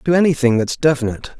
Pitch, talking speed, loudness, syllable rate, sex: 140 Hz, 170 wpm, -17 LUFS, 7.0 syllables/s, male